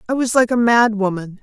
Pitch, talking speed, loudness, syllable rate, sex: 225 Hz, 210 wpm, -16 LUFS, 5.7 syllables/s, female